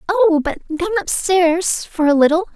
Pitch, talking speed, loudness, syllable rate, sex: 345 Hz, 165 wpm, -16 LUFS, 4.2 syllables/s, female